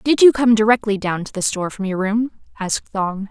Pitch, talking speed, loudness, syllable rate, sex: 210 Hz, 235 wpm, -18 LUFS, 5.7 syllables/s, female